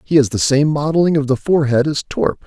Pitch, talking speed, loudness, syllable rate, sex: 145 Hz, 245 wpm, -16 LUFS, 5.9 syllables/s, male